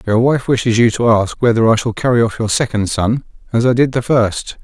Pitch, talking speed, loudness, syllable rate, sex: 115 Hz, 245 wpm, -15 LUFS, 5.5 syllables/s, male